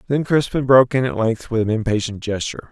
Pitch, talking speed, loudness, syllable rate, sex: 120 Hz, 220 wpm, -19 LUFS, 6.4 syllables/s, male